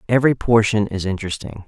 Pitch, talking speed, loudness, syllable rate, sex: 105 Hz, 145 wpm, -19 LUFS, 6.7 syllables/s, male